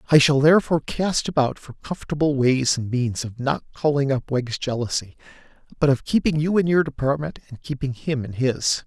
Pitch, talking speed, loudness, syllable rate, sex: 140 Hz, 190 wpm, -22 LUFS, 5.4 syllables/s, male